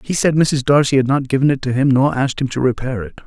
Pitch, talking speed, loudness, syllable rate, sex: 135 Hz, 295 wpm, -16 LUFS, 6.5 syllables/s, male